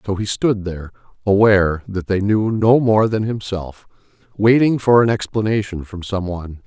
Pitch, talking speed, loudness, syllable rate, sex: 105 Hz, 170 wpm, -17 LUFS, 4.9 syllables/s, male